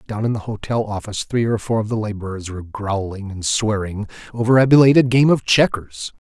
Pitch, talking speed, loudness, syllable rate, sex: 110 Hz, 200 wpm, -18 LUFS, 5.7 syllables/s, male